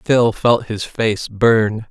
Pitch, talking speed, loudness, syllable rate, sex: 110 Hz, 155 wpm, -17 LUFS, 2.7 syllables/s, male